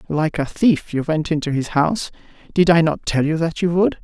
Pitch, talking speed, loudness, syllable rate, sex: 155 Hz, 225 wpm, -19 LUFS, 5.4 syllables/s, male